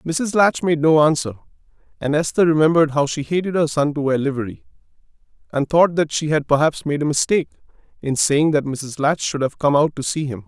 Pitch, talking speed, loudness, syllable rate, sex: 150 Hz, 210 wpm, -19 LUFS, 5.7 syllables/s, male